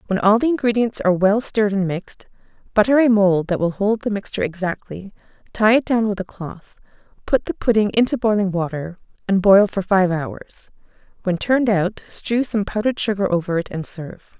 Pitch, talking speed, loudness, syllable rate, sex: 200 Hz, 190 wpm, -19 LUFS, 5.5 syllables/s, female